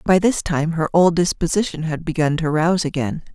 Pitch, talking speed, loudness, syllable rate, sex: 165 Hz, 195 wpm, -19 LUFS, 5.4 syllables/s, female